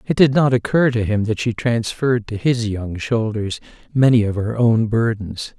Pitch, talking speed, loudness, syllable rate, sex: 115 Hz, 195 wpm, -18 LUFS, 4.7 syllables/s, male